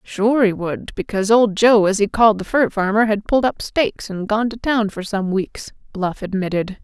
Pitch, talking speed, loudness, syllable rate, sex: 210 Hz, 220 wpm, -18 LUFS, 5.1 syllables/s, female